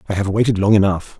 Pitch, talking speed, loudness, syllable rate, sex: 100 Hz, 250 wpm, -16 LUFS, 6.9 syllables/s, male